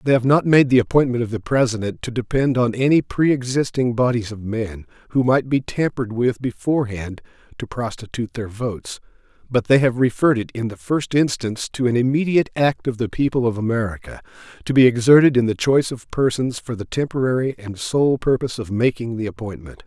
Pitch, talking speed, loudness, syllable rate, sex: 120 Hz, 190 wpm, -20 LUFS, 5.8 syllables/s, male